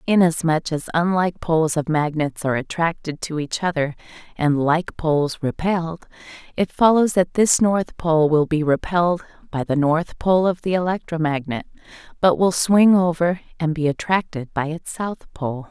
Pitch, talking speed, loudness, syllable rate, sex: 165 Hz, 160 wpm, -20 LUFS, 4.8 syllables/s, female